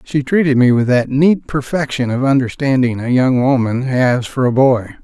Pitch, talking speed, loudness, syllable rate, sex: 130 Hz, 190 wpm, -14 LUFS, 4.7 syllables/s, male